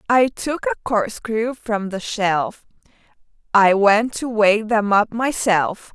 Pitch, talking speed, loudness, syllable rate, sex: 220 Hz, 140 wpm, -19 LUFS, 3.4 syllables/s, female